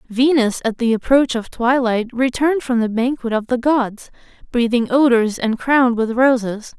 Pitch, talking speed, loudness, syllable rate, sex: 245 Hz, 170 wpm, -17 LUFS, 4.7 syllables/s, female